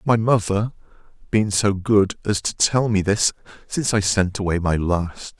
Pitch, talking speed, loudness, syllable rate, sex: 100 Hz, 180 wpm, -20 LUFS, 4.4 syllables/s, male